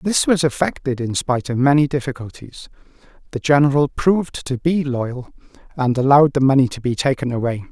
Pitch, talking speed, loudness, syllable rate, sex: 135 Hz, 170 wpm, -18 LUFS, 5.6 syllables/s, male